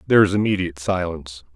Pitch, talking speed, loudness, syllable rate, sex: 90 Hz, 155 wpm, -20 LUFS, 7.5 syllables/s, male